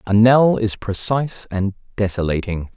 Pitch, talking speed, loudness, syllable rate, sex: 105 Hz, 130 wpm, -19 LUFS, 4.6 syllables/s, male